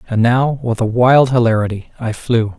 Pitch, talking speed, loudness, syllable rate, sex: 120 Hz, 185 wpm, -15 LUFS, 4.8 syllables/s, male